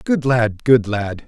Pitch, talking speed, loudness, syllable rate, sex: 120 Hz, 190 wpm, -17 LUFS, 3.4 syllables/s, male